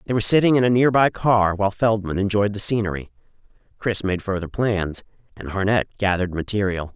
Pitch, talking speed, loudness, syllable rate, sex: 100 Hz, 170 wpm, -20 LUFS, 6.0 syllables/s, male